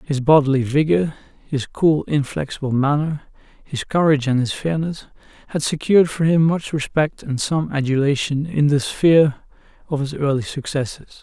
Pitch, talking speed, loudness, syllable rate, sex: 145 Hz, 150 wpm, -19 LUFS, 5.1 syllables/s, male